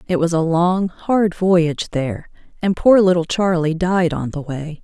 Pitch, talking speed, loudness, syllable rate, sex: 175 Hz, 185 wpm, -18 LUFS, 4.4 syllables/s, female